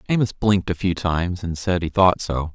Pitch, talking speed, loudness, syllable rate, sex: 90 Hz, 235 wpm, -21 LUFS, 5.5 syllables/s, male